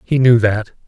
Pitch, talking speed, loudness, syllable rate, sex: 115 Hz, 205 wpm, -14 LUFS, 4.5 syllables/s, male